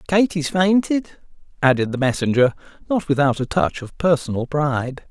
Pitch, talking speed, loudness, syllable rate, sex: 150 Hz, 140 wpm, -20 LUFS, 5.2 syllables/s, male